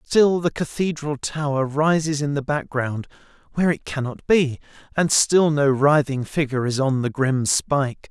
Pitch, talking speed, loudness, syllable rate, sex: 145 Hz, 165 wpm, -21 LUFS, 4.6 syllables/s, male